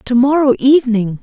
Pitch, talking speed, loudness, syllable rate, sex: 250 Hz, 145 wpm, -12 LUFS, 5.0 syllables/s, female